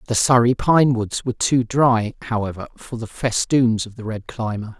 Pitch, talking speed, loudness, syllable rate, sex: 115 Hz, 190 wpm, -19 LUFS, 4.8 syllables/s, male